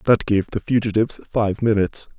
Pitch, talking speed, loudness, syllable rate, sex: 110 Hz, 165 wpm, -20 LUFS, 6.0 syllables/s, male